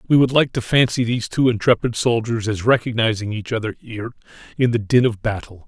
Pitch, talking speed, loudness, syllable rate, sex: 115 Hz, 200 wpm, -19 LUFS, 6.0 syllables/s, male